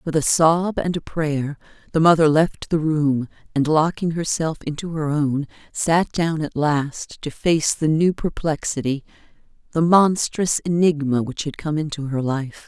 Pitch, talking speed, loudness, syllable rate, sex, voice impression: 155 Hz, 165 wpm, -21 LUFS, 4.2 syllables/s, female, slightly masculine, feminine, very gender-neutral, adult-like, slightly middle-aged, slightly thin, tensed, slightly powerful, bright, slightly soft, clear, fluent, slightly raspy, cool, very intellectual, refreshing, sincere, very calm, slightly friendly, reassuring, very unique, slightly elegant, wild, lively, kind